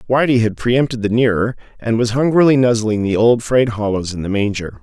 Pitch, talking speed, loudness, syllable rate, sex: 115 Hz, 200 wpm, -16 LUFS, 5.5 syllables/s, male